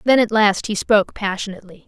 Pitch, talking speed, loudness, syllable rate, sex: 205 Hz, 190 wpm, -18 LUFS, 6.3 syllables/s, female